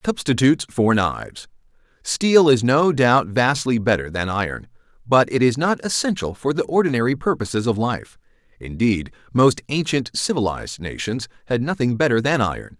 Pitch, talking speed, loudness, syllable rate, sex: 125 Hz, 145 wpm, -20 LUFS, 5.1 syllables/s, male